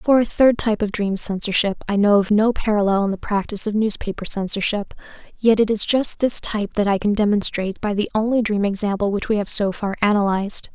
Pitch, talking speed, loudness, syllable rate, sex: 210 Hz, 220 wpm, -19 LUFS, 5.9 syllables/s, female